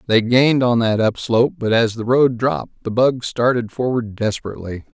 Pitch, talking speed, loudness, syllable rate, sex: 120 Hz, 180 wpm, -18 LUFS, 5.5 syllables/s, male